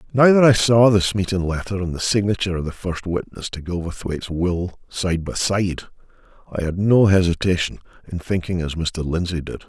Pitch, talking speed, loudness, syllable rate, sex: 95 Hz, 185 wpm, -20 LUFS, 5.4 syllables/s, male